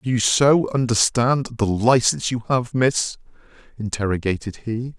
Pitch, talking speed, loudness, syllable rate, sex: 120 Hz, 130 wpm, -20 LUFS, 4.7 syllables/s, male